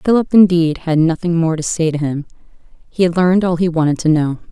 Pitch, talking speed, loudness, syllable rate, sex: 170 Hz, 225 wpm, -15 LUFS, 6.0 syllables/s, female